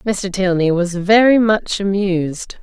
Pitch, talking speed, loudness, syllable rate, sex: 190 Hz, 135 wpm, -16 LUFS, 3.9 syllables/s, female